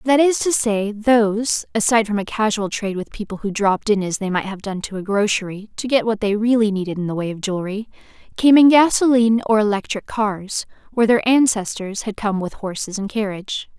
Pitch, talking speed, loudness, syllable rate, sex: 210 Hz, 215 wpm, -19 LUFS, 5.7 syllables/s, female